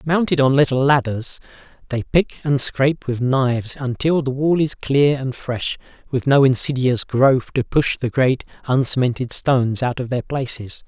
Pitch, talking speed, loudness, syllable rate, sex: 130 Hz, 170 wpm, -19 LUFS, 4.6 syllables/s, male